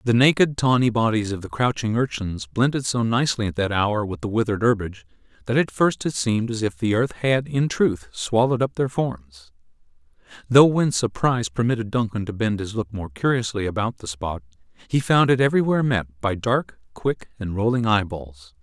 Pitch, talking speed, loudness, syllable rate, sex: 115 Hz, 190 wpm, -22 LUFS, 5.4 syllables/s, male